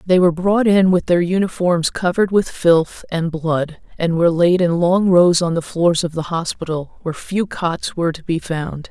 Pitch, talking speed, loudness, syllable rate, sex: 175 Hz, 210 wpm, -17 LUFS, 4.8 syllables/s, female